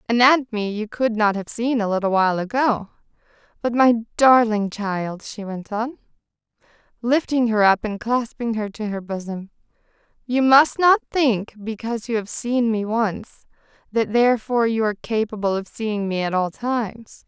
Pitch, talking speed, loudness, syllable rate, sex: 220 Hz, 165 wpm, -21 LUFS, 4.7 syllables/s, female